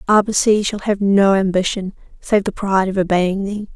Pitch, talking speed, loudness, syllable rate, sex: 195 Hz, 175 wpm, -17 LUFS, 5.1 syllables/s, female